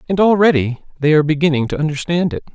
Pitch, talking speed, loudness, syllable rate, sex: 160 Hz, 190 wpm, -16 LUFS, 6.9 syllables/s, male